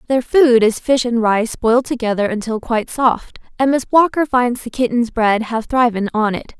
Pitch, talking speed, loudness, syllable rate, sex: 240 Hz, 200 wpm, -16 LUFS, 4.9 syllables/s, female